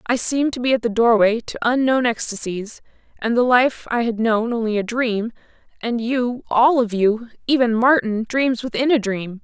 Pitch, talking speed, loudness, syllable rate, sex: 235 Hz, 170 wpm, -19 LUFS, 4.8 syllables/s, female